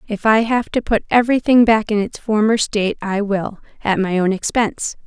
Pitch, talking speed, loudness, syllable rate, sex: 215 Hz, 200 wpm, -17 LUFS, 5.3 syllables/s, female